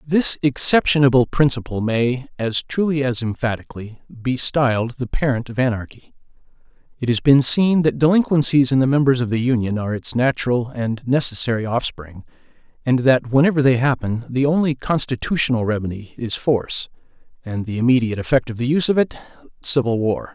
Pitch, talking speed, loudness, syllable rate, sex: 125 Hz, 160 wpm, -19 LUFS, 5.6 syllables/s, male